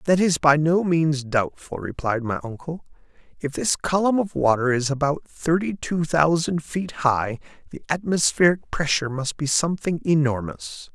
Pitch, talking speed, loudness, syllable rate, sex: 150 Hz, 155 wpm, -22 LUFS, 4.6 syllables/s, male